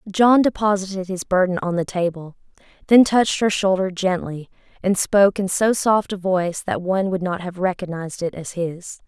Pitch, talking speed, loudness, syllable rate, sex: 190 Hz, 185 wpm, -20 LUFS, 5.3 syllables/s, female